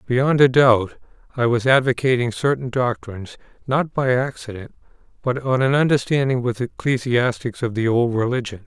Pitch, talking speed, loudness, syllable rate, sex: 125 Hz, 145 wpm, -19 LUFS, 5.0 syllables/s, male